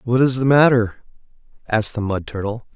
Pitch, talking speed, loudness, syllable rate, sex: 115 Hz, 175 wpm, -18 LUFS, 5.4 syllables/s, male